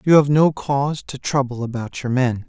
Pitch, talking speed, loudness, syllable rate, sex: 135 Hz, 220 wpm, -20 LUFS, 5.2 syllables/s, male